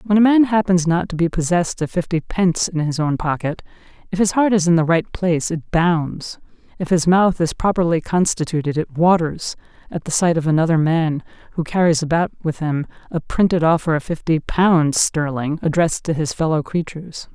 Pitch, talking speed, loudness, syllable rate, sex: 165 Hz, 195 wpm, -18 LUFS, 5.4 syllables/s, female